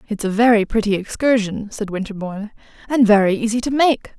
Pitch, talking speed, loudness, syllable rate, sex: 215 Hz, 170 wpm, -18 LUFS, 5.9 syllables/s, female